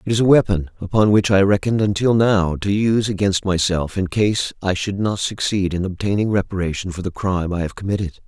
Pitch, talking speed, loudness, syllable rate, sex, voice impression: 100 Hz, 210 wpm, -19 LUFS, 5.8 syllables/s, male, very masculine, adult-like, slightly thick, cool, slightly sincere, calm